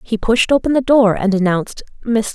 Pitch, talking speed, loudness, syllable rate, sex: 225 Hz, 205 wpm, -15 LUFS, 5.4 syllables/s, female